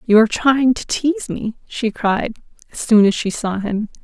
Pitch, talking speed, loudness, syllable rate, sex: 230 Hz, 210 wpm, -18 LUFS, 4.7 syllables/s, female